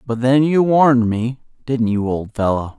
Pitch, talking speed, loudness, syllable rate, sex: 120 Hz, 195 wpm, -17 LUFS, 4.5 syllables/s, male